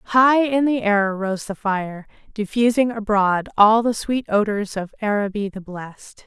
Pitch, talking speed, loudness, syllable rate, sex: 210 Hz, 165 wpm, -20 LUFS, 4.0 syllables/s, female